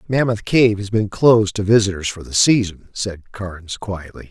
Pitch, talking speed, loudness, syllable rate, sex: 105 Hz, 180 wpm, -18 LUFS, 5.0 syllables/s, male